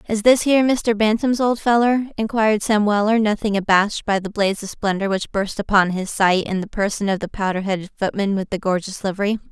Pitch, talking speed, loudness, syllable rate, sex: 205 Hz, 215 wpm, -19 LUFS, 6.0 syllables/s, female